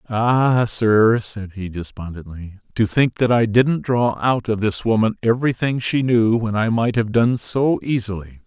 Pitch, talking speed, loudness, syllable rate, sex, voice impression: 110 Hz, 175 wpm, -19 LUFS, 4.3 syllables/s, male, masculine, very adult-like, slightly thick, slightly refreshing, sincere